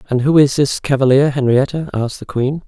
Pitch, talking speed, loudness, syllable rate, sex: 135 Hz, 200 wpm, -15 LUFS, 5.8 syllables/s, male